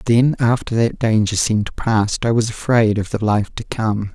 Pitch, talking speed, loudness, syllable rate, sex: 110 Hz, 205 wpm, -18 LUFS, 4.6 syllables/s, male